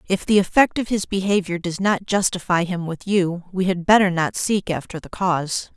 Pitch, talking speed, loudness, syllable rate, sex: 185 Hz, 210 wpm, -20 LUFS, 5.1 syllables/s, female